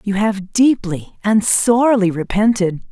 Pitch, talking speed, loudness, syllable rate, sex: 205 Hz, 125 wpm, -16 LUFS, 4.1 syllables/s, female